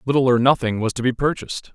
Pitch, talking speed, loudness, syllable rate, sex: 125 Hz, 240 wpm, -19 LUFS, 6.8 syllables/s, male